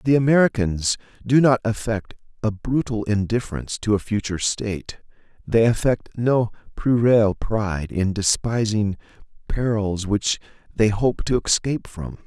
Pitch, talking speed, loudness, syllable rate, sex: 110 Hz, 125 wpm, -21 LUFS, 4.8 syllables/s, male